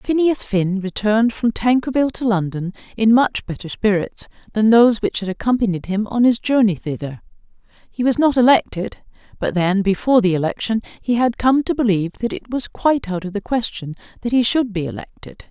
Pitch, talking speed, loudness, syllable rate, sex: 220 Hz, 185 wpm, -18 LUFS, 5.5 syllables/s, female